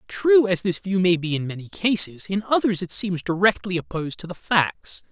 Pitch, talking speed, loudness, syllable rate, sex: 185 Hz, 210 wpm, -22 LUFS, 5.1 syllables/s, male